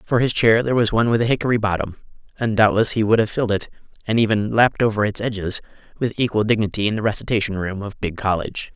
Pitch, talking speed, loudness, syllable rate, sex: 110 Hz, 225 wpm, -20 LUFS, 6.9 syllables/s, male